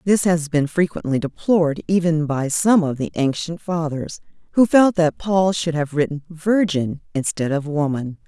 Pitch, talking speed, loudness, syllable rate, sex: 160 Hz, 165 wpm, -20 LUFS, 4.6 syllables/s, female